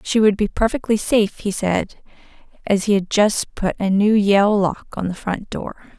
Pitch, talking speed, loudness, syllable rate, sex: 205 Hz, 200 wpm, -19 LUFS, 4.5 syllables/s, female